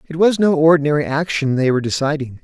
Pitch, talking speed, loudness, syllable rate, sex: 150 Hz, 195 wpm, -16 LUFS, 6.5 syllables/s, male